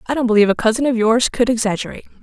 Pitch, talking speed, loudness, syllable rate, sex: 235 Hz, 240 wpm, -16 LUFS, 8.2 syllables/s, female